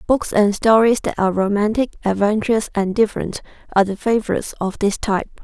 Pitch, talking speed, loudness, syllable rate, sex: 210 Hz, 165 wpm, -18 LUFS, 6.2 syllables/s, female